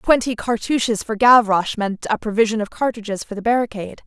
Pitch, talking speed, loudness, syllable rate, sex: 220 Hz, 175 wpm, -19 LUFS, 6.1 syllables/s, female